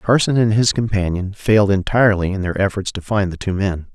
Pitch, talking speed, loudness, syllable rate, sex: 100 Hz, 215 wpm, -18 LUFS, 5.7 syllables/s, male